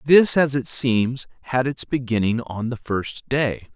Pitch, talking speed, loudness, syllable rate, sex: 125 Hz, 175 wpm, -21 LUFS, 3.8 syllables/s, male